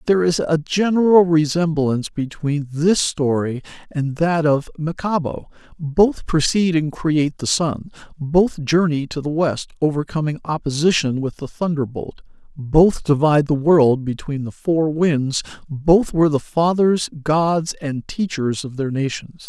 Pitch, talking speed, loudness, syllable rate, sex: 155 Hz, 140 wpm, -19 LUFS, 4.3 syllables/s, male